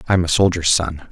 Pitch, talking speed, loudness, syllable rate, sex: 85 Hz, 215 wpm, -17 LUFS, 5.4 syllables/s, male